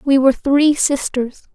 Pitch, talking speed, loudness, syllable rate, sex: 275 Hz, 155 wpm, -16 LUFS, 4.3 syllables/s, female